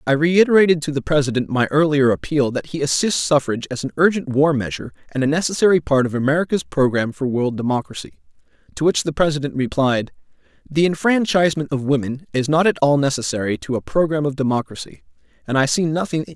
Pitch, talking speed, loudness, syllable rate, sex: 145 Hz, 185 wpm, -19 LUFS, 6.2 syllables/s, male